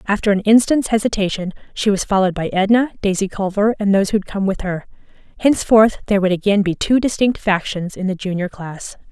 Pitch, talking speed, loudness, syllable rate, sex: 200 Hz, 195 wpm, -17 LUFS, 6.1 syllables/s, female